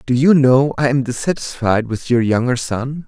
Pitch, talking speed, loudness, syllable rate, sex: 130 Hz, 195 wpm, -16 LUFS, 4.8 syllables/s, male